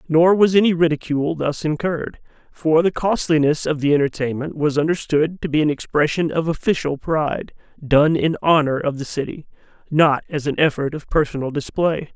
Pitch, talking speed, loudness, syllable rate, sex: 155 Hz, 170 wpm, -19 LUFS, 5.3 syllables/s, male